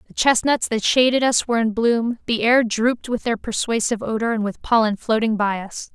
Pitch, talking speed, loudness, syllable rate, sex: 230 Hz, 210 wpm, -20 LUFS, 5.5 syllables/s, female